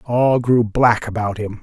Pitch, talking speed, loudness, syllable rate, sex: 110 Hz, 185 wpm, -17 LUFS, 4.0 syllables/s, male